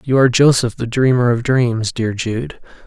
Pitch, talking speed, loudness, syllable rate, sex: 120 Hz, 190 wpm, -16 LUFS, 4.7 syllables/s, male